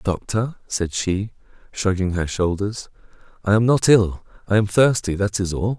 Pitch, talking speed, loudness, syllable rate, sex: 100 Hz, 165 wpm, -20 LUFS, 4.7 syllables/s, male